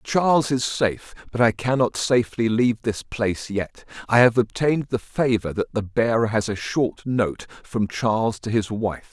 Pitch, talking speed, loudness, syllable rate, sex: 115 Hz, 185 wpm, -22 LUFS, 4.8 syllables/s, male